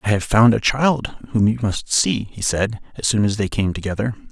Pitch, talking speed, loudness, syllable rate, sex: 110 Hz, 235 wpm, -19 LUFS, 5.1 syllables/s, male